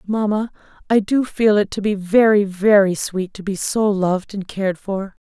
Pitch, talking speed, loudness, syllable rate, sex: 200 Hz, 195 wpm, -18 LUFS, 4.7 syllables/s, female